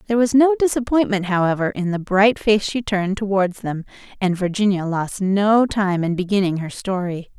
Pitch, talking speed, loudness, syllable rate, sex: 200 Hz, 180 wpm, -19 LUFS, 5.2 syllables/s, female